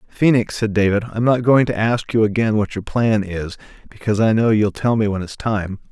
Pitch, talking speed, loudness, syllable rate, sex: 110 Hz, 235 wpm, -18 LUFS, 5.3 syllables/s, male